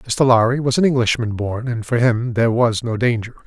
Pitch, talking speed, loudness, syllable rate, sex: 120 Hz, 225 wpm, -18 LUFS, 5.3 syllables/s, male